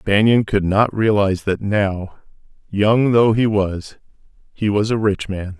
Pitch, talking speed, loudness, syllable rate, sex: 105 Hz, 160 wpm, -17 LUFS, 4.0 syllables/s, male